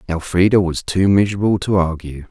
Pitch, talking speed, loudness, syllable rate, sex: 90 Hz, 155 wpm, -16 LUFS, 5.6 syllables/s, male